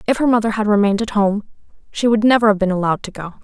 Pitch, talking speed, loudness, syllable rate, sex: 210 Hz, 260 wpm, -17 LUFS, 7.5 syllables/s, female